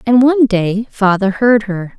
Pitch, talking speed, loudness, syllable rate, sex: 215 Hz, 180 wpm, -13 LUFS, 4.4 syllables/s, female